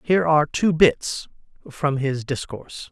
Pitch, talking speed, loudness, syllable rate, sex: 150 Hz, 145 wpm, -21 LUFS, 4.6 syllables/s, male